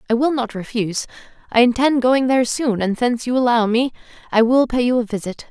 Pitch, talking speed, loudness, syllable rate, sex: 240 Hz, 220 wpm, -18 LUFS, 6.0 syllables/s, female